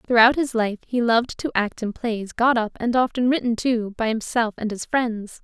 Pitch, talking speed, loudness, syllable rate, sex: 230 Hz, 220 wpm, -22 LUFS, 4.9 syllables/s, female